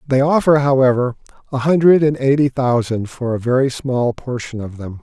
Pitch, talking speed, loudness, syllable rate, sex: 130 Hz, 180 wpm, -16 LUFS, 5.1 syllables/s, male